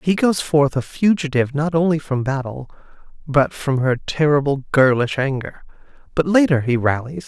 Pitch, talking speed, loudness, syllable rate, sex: 145 Hz, 155 wpm, -18 LUFS, 4.9 syllables/s, male